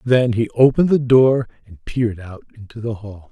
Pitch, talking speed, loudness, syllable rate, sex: 115 Hz, 200 wpm, -17 LUFS, 5.4 syllables/s, male